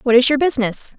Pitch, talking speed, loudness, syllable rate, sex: 255 Hz, 245 wpm, -16 LUFS, 6.7 syllables/s, female